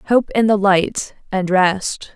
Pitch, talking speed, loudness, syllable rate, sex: 200 Hz, 165 wpm, -17 LUFS, 3.2 syllables/s, female